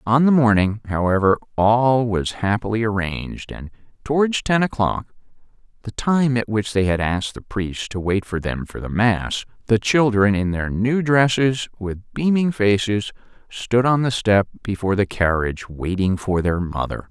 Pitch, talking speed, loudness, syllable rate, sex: 110 Hz, 160 wpm, -20 LUFS, 4.6 syllables/s, male